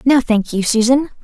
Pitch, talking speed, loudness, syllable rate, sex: 240 Hz, 195 wpm, -15 LUFS, 4.9 syllables/s, female